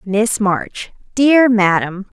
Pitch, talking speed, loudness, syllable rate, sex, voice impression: 215 Hz, 110 wpm, -14 LUFS, 2.8 syllables/s, female, very feminine, slightly young, adult-like, very thin, tensed, slightly weak, very bright, soft, clear, fluent, very cute, slightly intellectual, refreshing, sincere, calm, friendly, reassuring, very unique, very elegant, wild, very sweet, very lively, strict, intense, slightly sharp